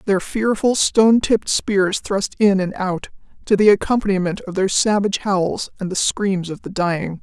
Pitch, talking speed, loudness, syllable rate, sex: 195 Hz, 185 wpm, -18 LUFS, 4.8 syllables/s, female